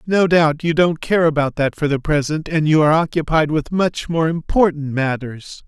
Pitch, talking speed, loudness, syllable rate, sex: 155 Hz, 200 wpm, -17 LUFS, 4.9 syllables/s, male